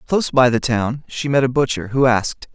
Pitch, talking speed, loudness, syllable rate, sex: 125 Hz, 235 wpm, -18 LUFS, 5.6 syllables/s, male